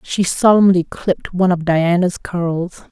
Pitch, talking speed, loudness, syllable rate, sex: 180 Hz, 145 wpm, -16 LUFS, 4.4 syllables/s, female